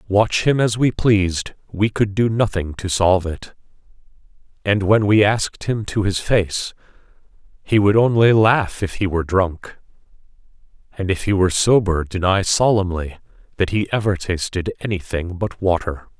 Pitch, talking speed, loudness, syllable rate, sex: 100 Hz, 155 wpm, -18 LUFS, 4.8 syllables/s, male